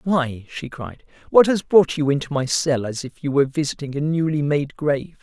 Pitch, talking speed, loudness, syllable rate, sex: 145 Hz, 220 wpm, -20 LUFS, 5.2 syllables/s, male